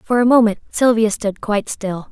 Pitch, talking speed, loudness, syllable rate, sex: 215 Hz, 200 wpm, -17 LUFS, 5.1 syllables/s, female